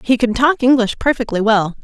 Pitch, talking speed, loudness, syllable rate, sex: 235 Hz, 195 wpm, -15 LUFS, 5.4 syllables/s, female